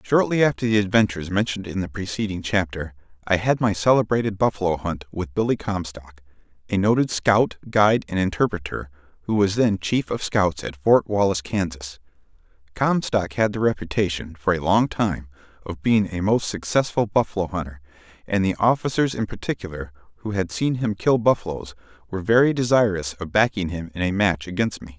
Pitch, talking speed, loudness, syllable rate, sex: 95 Hz, 170 wpm, -22 LUFS, 5.6 syllables/s, male